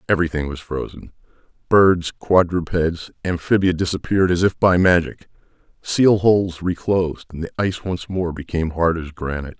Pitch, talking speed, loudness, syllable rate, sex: 85 Hz, 140 wpm, -19 LUFS, 5.3 syllables/s, male